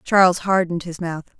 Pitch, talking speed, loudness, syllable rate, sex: 175 Hz, 175 wpm, -20 LUFS, 6.0 syllables/s, female